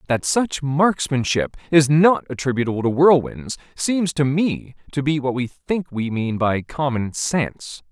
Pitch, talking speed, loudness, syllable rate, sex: 140 Hz, 160 wpm, -20 LUFS, 4.2 syllables/s, male